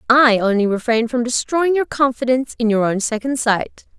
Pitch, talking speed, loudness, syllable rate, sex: 240 Hz, 180 wpm, -17 LUFS, 5.5 syllables/s, female